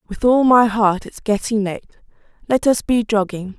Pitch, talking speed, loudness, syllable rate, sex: 220 Hz, 185 wpm, -17 LUFS, 4.7 syllables/s, female